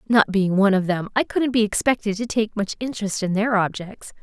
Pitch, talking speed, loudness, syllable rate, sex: 210 Hz, 225 wpm, -21 LUFS, 5.6 syllables/s, female